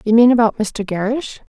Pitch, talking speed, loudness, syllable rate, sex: 225 Hz, 195 wpm, -16 LUFS, 5.2 syllables/s, female